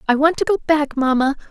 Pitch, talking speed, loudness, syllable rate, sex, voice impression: 290 Hz, 240 wpm, -18 LUFS, 6.3 syllables/s, female, very feminine, slightly young, very adult-like, very thin, tensed, powerful, bright, hard, very clear, very fluent, very cute, intellectual, refreshing, very sincere, calm, friendly, reassuring, very unique, very elegant, slightly wild, very sweet, very lively, very kind, slightly intense, modest, very light